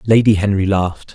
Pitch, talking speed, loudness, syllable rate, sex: 100 Hz, 155 wpm, -15 LUFS, 5.9 syllables/s, male